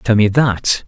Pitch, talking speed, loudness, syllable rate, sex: 110 Hz, 205 wpm, -14 LUFS, 3.6 syllables/s, male